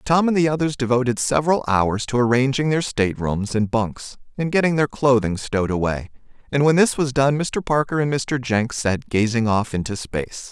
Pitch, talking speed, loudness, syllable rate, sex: 125 Hz, 195 wpm, -20 LUFS, 5.2 syllables/s, male